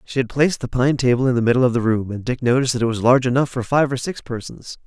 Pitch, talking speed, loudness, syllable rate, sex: 125 Hz, 310 wpm, -19 LUFS, 7.0 syllables/s, male